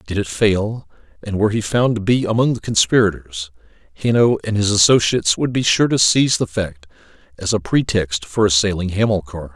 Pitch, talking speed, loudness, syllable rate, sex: 105 Hz, 180 wpm, -17 LUFS, 5.5 syllables/s, male